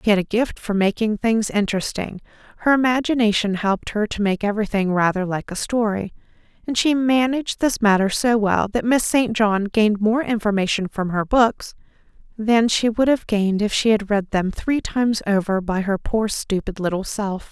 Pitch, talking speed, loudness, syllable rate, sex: 215 Hz, 190 wpm, -20 LUFS, 5.2 syllables/s, female